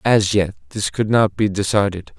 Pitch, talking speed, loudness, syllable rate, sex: 100 Hz, 190 wpm, -19 LUFS, 4.4 syllables/s, male